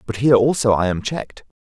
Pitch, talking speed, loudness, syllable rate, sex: 120 Hz, 220 wpm, -17 LUFS, 6.7 syllables/s, male